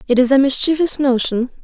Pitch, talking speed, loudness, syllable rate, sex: 265 Hz, 185 wpm, -15 LUFS, 5.8 syllables/s, female